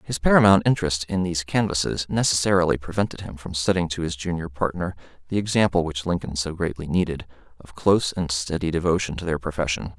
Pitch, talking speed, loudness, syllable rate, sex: 85 Hz, 180 wpm, -23 LUFS, 6.2 syllables/s, male